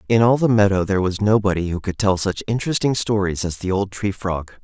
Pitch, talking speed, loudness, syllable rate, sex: 100 Hz, 235 wpm, -20 LUFS, 6.0 syllables/s, male